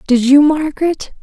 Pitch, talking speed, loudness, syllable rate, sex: 285 Hz, 145 wpm, -13 LUFS, 4.9 syllables/s, female